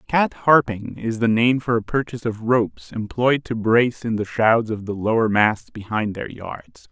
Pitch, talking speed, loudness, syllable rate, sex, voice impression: 115 Hz, 200 wpm, -20 LUFS, 4.6 syllables/s, male, very masculine, middle-aged, very thick, tensed, powerful, slightly bright, slightly soft, muffled, fluent, raspy, cool, intellectual, slightly refreshing, sincere, very calm, very mature, friendly, reassuring, unique, slightly elegant, wild, slightly sweet, lively, kind, slightly intense, slightly modest